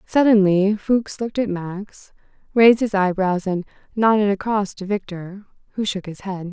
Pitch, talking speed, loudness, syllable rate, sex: 200 Hz, 155 wpm, -20 LUFS, 4.7 syllables/s, female